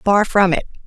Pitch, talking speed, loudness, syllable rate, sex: 195 Hz, 210 wpm, -16 LUFS, 4.8 syllables/s, female